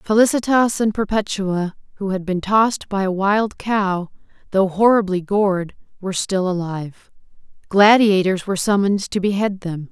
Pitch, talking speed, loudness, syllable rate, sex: 195 Hz, 140 wpm, -18 LUFS, 4.9 syllables/s, female